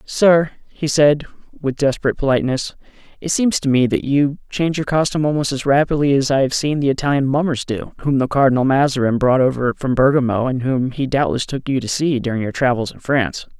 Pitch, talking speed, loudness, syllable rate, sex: 135 Hz, 205 wpm, -18 LUFS, 5.9 syllables/s, male